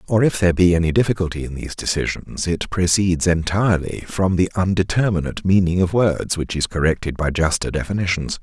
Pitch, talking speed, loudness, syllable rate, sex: 90 Hz, 170 wpm, -19 LUFS, 5.9 syllables/s, male